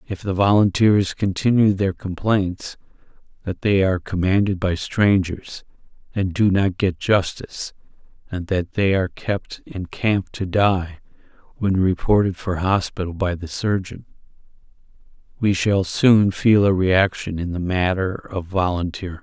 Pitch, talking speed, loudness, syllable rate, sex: 95 Hz, 135 wpm, -20 LUFS, 4.3 syllables/s, male